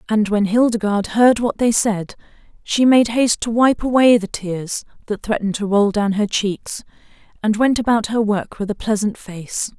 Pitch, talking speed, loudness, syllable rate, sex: 215 Hz, 190 wpm, -18 LUFS, 4.8 syllables/s, female